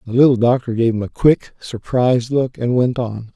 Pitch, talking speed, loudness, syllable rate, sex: 120 Hz, 215 wpm, -17 LUFS, 5.1 syllables/s, male